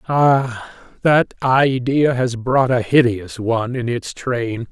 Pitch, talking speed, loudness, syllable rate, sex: 125 Hz, 140 wpm, -18 LUFS, 3.4 syllables/s, male